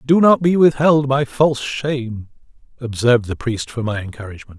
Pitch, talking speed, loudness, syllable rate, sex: 130 Hz, 170 wpm, -17 LUFS, 5.4 syllables/s, male